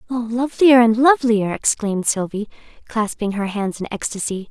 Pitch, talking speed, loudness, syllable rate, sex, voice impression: 225 Hz, 135 wpm, -18 LUFS, 5.2 syllables/s, female, very feminine, young, very thin, very tensed, powerful, very bright, soft, very clear, very fluent, slightly raspy, very cute, very intellectual, refreshing, sincere, slightly calm, very friendly, slightly reassuring, very unique, elegant, slightly wild, sweet, very lively, kind, intense, very sharp, very light